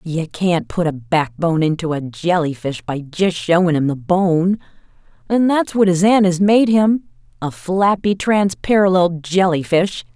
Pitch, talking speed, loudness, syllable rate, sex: 175 Hz, 140 wpm, -17 LUFS, 4.2 syllables/s, female